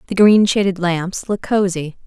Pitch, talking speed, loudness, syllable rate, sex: 190 Hz, 175 wpm, -16 LUFS, 4.4 syllables/s, female